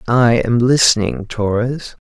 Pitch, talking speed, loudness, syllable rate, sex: 120 Hz, 115 wpm, -15 LUFS, 3.8 syllables/s, male